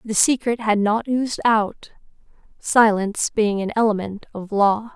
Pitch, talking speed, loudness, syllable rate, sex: 215 Hz, 145 wpm, -20 LUFS, 4.5 syllables/s, female